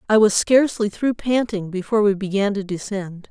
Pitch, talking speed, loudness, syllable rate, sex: 205 Hz, 180 wpm, -20 LUFS, 5.4 syllables/s, female